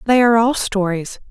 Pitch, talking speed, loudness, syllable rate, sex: 215 Hz, 185 wpm, -16 LUFS, 5.6 syllables/s, female